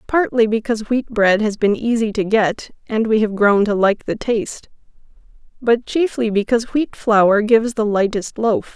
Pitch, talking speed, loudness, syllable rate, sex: 220 Hz, 180 wpm, -17 LUFS, 4.8 syllables/s, female